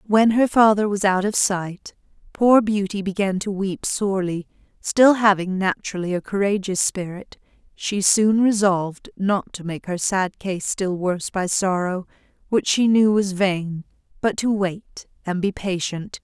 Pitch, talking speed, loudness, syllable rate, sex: 195 Hz, 160 wpm, -21 LUFS, 4.3 syllables/s, female